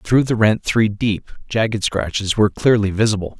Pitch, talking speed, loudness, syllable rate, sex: 105 Hz, 175 wpm, -18 LUFS, 5.1 syllables/s, male